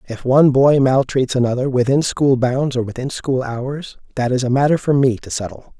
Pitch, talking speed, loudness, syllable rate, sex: 130 Hz, 205 wpm, -17 LUFS, 5.1 syllables/s, male